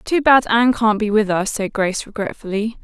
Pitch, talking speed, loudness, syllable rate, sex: 215 Hz, 210 wpm, -17 LUFS, 5.4 syllables/s, female